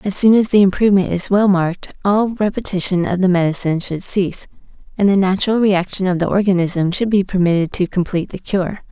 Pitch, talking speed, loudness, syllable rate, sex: 190 Hz, 195 wpm, -16 LUFS, 6.0 syllables/s, female